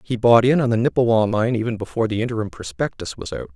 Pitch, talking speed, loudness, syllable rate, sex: 115 Hz, 235 wpm, -20 LUFS, 6.7 syllables/s, male